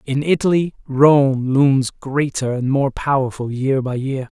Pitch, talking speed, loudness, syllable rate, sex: 135 Hz, 150 wpm, -18 LUFS, 3.9 syllables/s, male